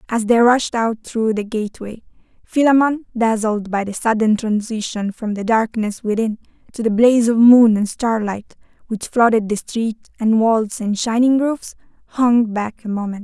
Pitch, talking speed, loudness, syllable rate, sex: 225 Hz, 170 wpm, -17 LUFS, 4.6 syllables/s, female